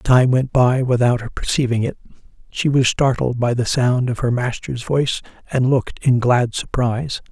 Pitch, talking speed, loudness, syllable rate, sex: 125 Hz, 180 wpm, -18 LUFS, 4.9 syllables/s, male